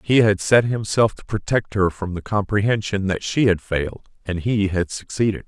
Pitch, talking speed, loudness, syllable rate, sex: 100 Hz, 195 wpm, -21 LUFS, 5.1 syllables/s, male